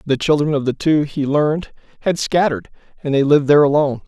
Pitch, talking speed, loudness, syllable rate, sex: 145 Hz, 205 wpm, -17 LUFS, 6.7 syllables/s, male